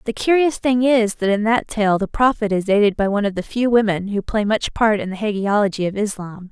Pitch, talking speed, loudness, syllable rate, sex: 210 Hz, 250 wpm, -18 LUFS, 5.7 syllables/s, female